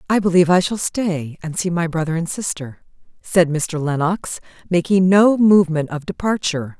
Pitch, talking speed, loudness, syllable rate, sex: 175 Hz, 170 wpm, -18 LUFS, 5.1 syllables/s, female